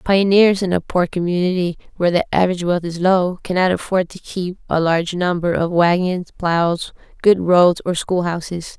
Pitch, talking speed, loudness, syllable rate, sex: 180 Hz, 175 wpm, -18 LUFS, 5.0 syllables/s, female